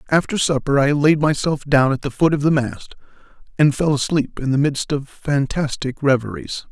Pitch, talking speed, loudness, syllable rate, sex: 140 Hz, 190 wpm, -19 LUFS, 5.0 syllables/s, male